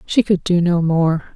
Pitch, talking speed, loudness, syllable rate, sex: 175 Hz, 220 wpm, -17 LUFS, 4.4 syllables/s, female